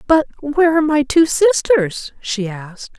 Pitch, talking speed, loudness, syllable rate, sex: 280 Hz, 160 wpm, -16 LUFS, 4.7 syllables/s, female